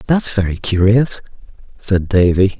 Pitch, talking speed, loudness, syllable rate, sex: 100 Hz, 115 wpm, -15 LUFS, 4.3 syllables/s, male